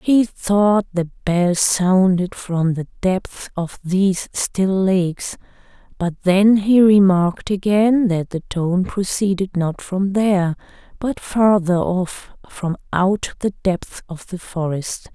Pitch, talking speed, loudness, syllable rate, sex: 190 Hz, 135 wpm, -18 LUFS, 3.4 syllables/s, female